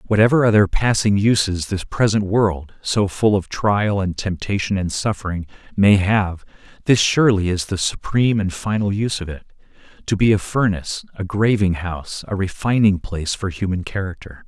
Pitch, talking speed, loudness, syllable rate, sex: 100 Hz, 160 wpm, -19 LUFS, 5.2 syllables/s, male